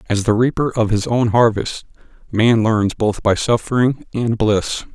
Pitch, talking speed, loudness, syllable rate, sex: 115 Hz, 170 wpm, -17 LUFS, 4.2 syllables/s, male